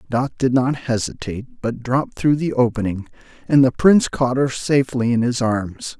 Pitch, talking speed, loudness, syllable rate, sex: 125 Hz, 180 wpm, -19 LUFS, 5.0 syllables/s, male